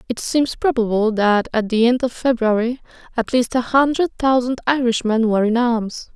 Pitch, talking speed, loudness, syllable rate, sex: 240 Hz, 175 wpm, -18 LUFS, 5.0 syllables/s, female